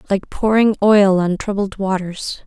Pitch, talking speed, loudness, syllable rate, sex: 195 Hz, 145 wpm, -17 LUFS, 4.2 syllables/s, female